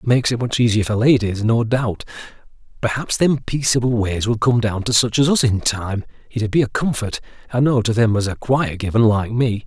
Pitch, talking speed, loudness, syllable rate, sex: 115 Hz, 225 wpm, -18 LUFS, 5.5 syllables/s, male